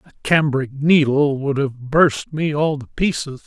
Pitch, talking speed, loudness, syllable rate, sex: 145 Hz, 175 wpm, -18 LUFS, 4.2 syllables/s, male